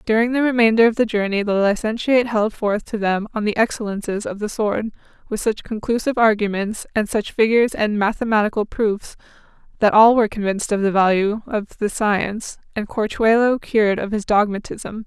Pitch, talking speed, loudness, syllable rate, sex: 215 Hz, 175 wpm, -19 LUFS, 5.5 syllables/s, female